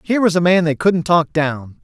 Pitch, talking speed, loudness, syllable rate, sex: 170 Hz, 260 wpm, -16 LUFS, 5.3 syllables/s, male